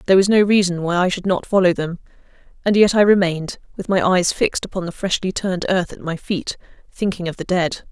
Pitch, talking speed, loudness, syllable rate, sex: 185 Hz, 230 wpm, -18 LUFS, 6.1 syllables/s, female